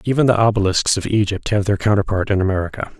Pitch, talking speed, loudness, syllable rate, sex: 100 Hz, 200 wpm, -18 LUFS, 6.7 syllables/s, male